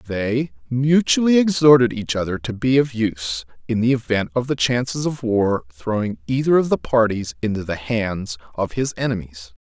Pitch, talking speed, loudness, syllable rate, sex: 115 Hz, 175 wpm, -20 LUFS, 4.8 syllables/s, male